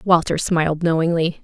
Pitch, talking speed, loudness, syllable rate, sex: 165 Hz, 125 wpm, -19 LUFS, 5.3 syllables/s, female